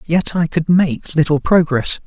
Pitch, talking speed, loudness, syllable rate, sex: 160 Hz, 175 wpm, -16 LUFS, 4.2 syllables/s, male